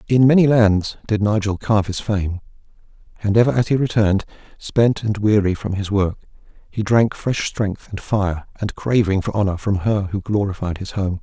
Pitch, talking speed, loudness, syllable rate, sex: 105 Hz, 185 wpm, -19 LUFS, 5.0 syllables/s, male